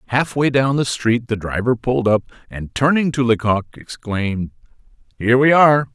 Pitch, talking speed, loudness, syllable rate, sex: 120 Hz, 160 wpm, -17 LUFS, 5.3 syllables/s, male